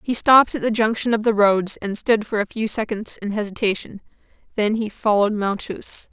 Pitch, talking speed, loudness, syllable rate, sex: 215 Hz, 195 wpm, -20 LUFS, 5.3 syllables/s, female